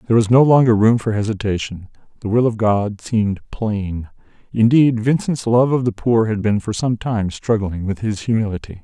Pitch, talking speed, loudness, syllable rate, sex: 110 Hz, 190 wpm, -18 LUFS, 5.1 syllables/s, male